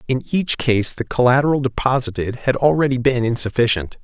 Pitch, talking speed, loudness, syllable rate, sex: 125 Hz, 150 wpm, -18 LUFS, 5.6 syllables/s, male